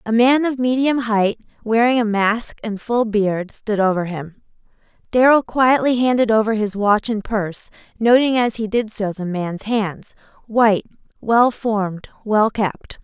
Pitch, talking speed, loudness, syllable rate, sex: 220 Hz, 160 wpm, -18 LUFS, 4.2 syllables/s, female